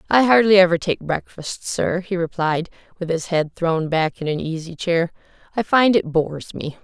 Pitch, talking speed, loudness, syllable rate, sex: 175 Hz, 195 wpm, -20 LUFS, 4.8 syllables/s, female